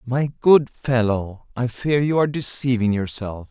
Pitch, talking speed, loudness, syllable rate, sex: 125 Hz, 155 wpm, -20 LUFS, 4.3 syllables/s, male